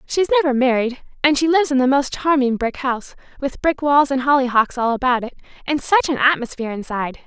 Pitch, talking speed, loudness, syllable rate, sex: 270 Hz, 205 wpm, -18 LUFS, 6.2 syllables/s, female